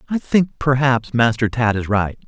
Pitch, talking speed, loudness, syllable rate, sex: 125 Hz, 185 wpm, -18 LUFS, 4.5 syllables/s, male